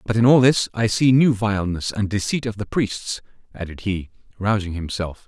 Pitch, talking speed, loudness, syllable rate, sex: 105 Hz, 195 wpm, -20 LUFS, 5.1 syllables/s, male